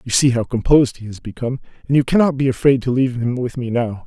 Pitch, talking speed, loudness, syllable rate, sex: 125 Hz, 265 wpm, -18 LUFS, 6.7 syllables/s, male